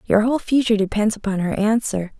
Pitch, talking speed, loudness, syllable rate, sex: 215 Hz, 190 wpm, -20 LUFS, 6.3 syllables/s, female